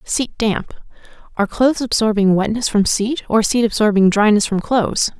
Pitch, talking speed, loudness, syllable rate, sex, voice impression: 220 Hz, 160 wpm, -16 LUFS, 5.3 syllables/s, female, feminine, adult-like, powerful, bright, slightly fluent, intellectual, elegant, lively, sharp